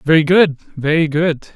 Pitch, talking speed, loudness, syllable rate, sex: 155 Hz, 155 wpm, -15 LUFS, 4.7 syllables/s, male